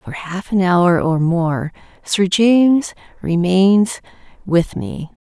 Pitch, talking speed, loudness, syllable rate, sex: 185 Hz, 125 wpm, -16 LUFS, 3.3 syllables/s, female